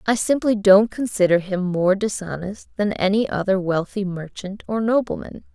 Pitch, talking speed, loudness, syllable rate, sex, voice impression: 200 Hz, 150 wpm, -20 LUFS, 4.8 syllables/s, female, very feminine, slightly young, slightly adult-like, very thin, slightly tensed, slightly weak, bright, slightly soft, clear, slightly muffled, very cute, intellectual, very refreshing, sincere, very calm, friendly, very reassuring, slightly unique, very elegant, slightly wild, sweet, slightly strict, slightly sharp